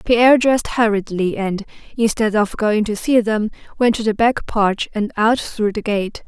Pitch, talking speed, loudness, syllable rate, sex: 220 Hz, 190 wpm, -18 LUFS, 4.6 syllables/s, female